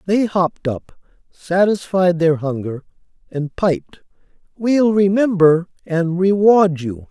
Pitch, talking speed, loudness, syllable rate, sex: 180 Hz, 110 wpm, -17 LUFS, 3.6 syllables/s, male